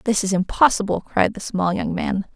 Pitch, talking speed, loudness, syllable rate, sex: 200 Hz, 205 wpm, -20 LUFS, 5.1 syllables/s, female